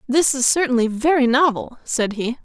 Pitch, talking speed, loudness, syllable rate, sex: 260 Hz, 170 wpm, -18 LUFS, 5.0 syllables/s, female